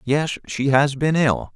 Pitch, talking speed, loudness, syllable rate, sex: 140 Hz, 195 wpm, -20 LUFS, 3.9 syllables/s, male